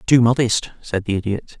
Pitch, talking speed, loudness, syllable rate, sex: 110 Hz, 190 wpm, -19 LUFS, 5.0 syllables/s, male